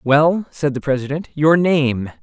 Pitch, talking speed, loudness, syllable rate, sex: 150 Hz, 160 wpm, -17 LUFS, 3.9 syllables/s, male